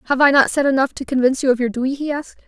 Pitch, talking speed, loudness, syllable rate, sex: 265 Hz, 315 wpm, -17 LUFS, 8.1 syllables/s, female